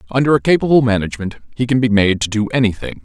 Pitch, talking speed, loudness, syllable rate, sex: 115 Hz, 215 wpm, -15 LUFS, 7.0 syllables/s, male